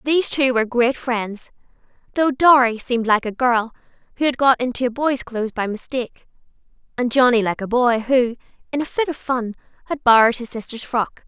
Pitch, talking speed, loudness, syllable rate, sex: 245 Hz, 185 wpm, -19 LUFS, 5.5 syllables/s, female